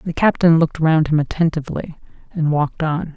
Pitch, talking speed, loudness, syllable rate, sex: 160 Hz, 170 wpm, -18 LUFS, 6.0 syllables/s, female